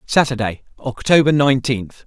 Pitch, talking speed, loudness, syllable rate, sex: 125 Hz, 85 wpm, -17 LUFS, 5.0 syllables/s, male